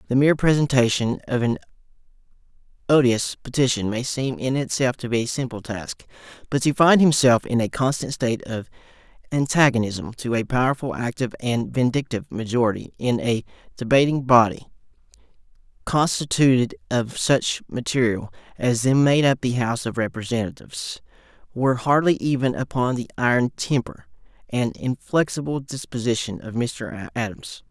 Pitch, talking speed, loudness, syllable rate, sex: 125 Hz, 135 wpm, -22 LUFS, 5.2 syllables/s, male